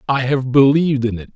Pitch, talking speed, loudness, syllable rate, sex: 130 Hz, 220 wpm, -16 LUFS, 5.9 syllables/s, male